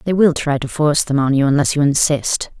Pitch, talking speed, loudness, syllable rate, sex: 145 Hz, 255 wpm, -16 LUFS, 5.8 syllables/s, female